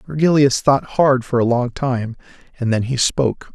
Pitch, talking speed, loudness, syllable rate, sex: 130 Hz, 185 wpm, -17 LUFS, 4.7 syllables/s, male